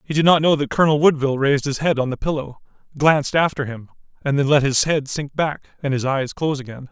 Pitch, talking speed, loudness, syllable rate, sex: 145 Hz, 245 wpm, -19 LUFS, 6.3 syllables/s, male